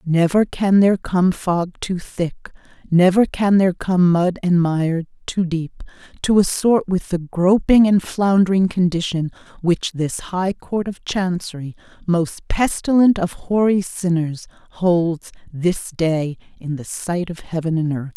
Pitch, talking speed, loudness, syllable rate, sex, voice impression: 180 Hz, 150 wpm, -19 LUFS, 3.9 syllables/s, female, feminine, middle-aged, tensed, powerful, slightly hard, slightly halting, raspy, intellectual, calm, friendly, slightly reassuring, elegant, lively, strict, sharp